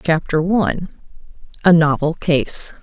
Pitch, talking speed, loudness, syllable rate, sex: 165 Hz, 105 wpm, -17 LUFS, 4.2 syllables/s, female